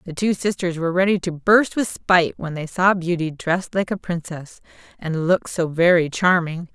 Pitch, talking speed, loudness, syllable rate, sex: 175 Hz, 195 wpm, -20 LUFS, 5.0 syllables/s, female